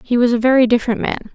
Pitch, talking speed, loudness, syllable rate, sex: 235 Hz, 265 wpm, -15 LUFS, 8.1 syllables/s, female